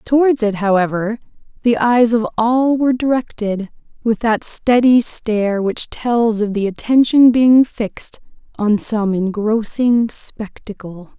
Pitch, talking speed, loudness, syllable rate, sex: 225 Hz, 130 wpm, -16 LUFS, 4.0 syllables/s, female